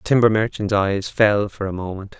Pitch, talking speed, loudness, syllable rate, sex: 105 Hz, 220 wpm, -20 LUFS, 5.3 syllables/s, male